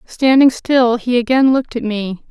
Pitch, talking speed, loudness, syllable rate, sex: 245 Hz, 180 wpm, -14 LUFS, 4.6 syllables/s, female